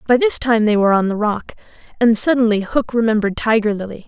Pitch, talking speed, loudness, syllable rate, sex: 225 Hz, 205 wpm, -16 LUFS, 6.1 syllables/s, female